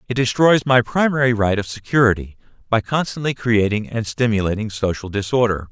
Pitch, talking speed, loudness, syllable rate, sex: 115 Hz, 145 wpm, -19 LUFS, 5.6 syllables/s, male